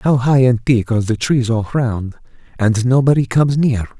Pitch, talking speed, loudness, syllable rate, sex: 125 Hz, 195 wpm, -15 LUFS, 5.0 syllables/s, male